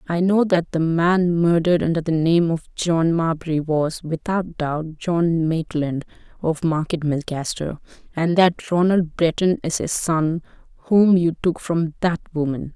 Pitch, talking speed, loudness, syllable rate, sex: 165 Hz, 155 wpm, -20 LUFS, 4.2 syllables/s, female